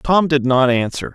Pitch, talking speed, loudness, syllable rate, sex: 140 Hz, 210 wpm, -16 LUFS, 4.8 syllables/s, male